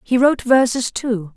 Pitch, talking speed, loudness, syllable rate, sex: 245 Hz, 175 wpm, -17 LUFS, 4.8 syllables/s, female